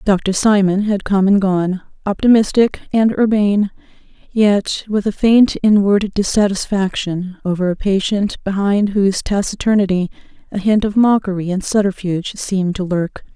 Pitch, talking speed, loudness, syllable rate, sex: 200 Hz, 135 wpm, -16 LUFS, 4.8 syllables/s, female